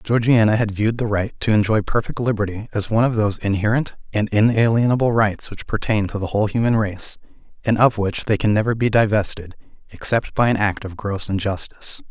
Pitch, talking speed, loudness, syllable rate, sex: 105 Hz, 195 wpm, -20 LUFS, 5.9 syllables/s, male